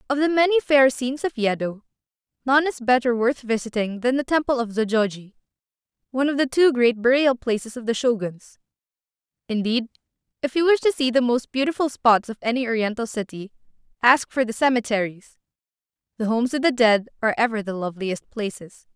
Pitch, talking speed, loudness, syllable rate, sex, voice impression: 240 Hz, 175 wpm, -22 LUFS, 5.8 syllables/s, female, feminine, slightly gender-neutral, slightly young, slightly adult-like, thin, slightly tensed, slightly powerful, bright, hard, clear, slightly fluent, cute, intellectual, slightly refreshing, slightly sincere, friendly, reassuring, unique, elegant, slightly sweet, lively, slightly kind, slightly modest